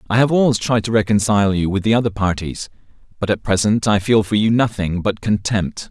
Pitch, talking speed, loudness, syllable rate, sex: 105 Hz, 215 wpm, -17 LUFS, 5.8 syllables/s, male